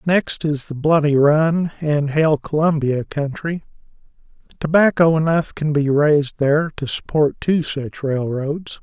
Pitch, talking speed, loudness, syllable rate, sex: 150 Hz, 130 wpm, -18 LUFS, 4.1 syllables/s, male